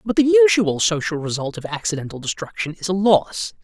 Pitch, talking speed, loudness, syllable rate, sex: 180 Hz, 180 wpm, -19 LUFS, 5.5 syllables/s, male